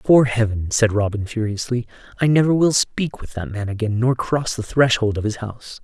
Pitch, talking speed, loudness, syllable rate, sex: 115 Hz, 195 wpm, -20 LUFS, 5.2 syllables/s, male